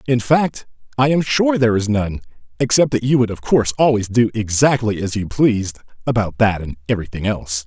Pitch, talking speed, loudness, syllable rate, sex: 115 Hz, 195 wpm, -17 LUFS, 5.8 syllables/s, male